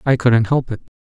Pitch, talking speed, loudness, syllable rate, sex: 120 Hz, 230 wpm, -16 LUFS, 5.6 syllables/s, male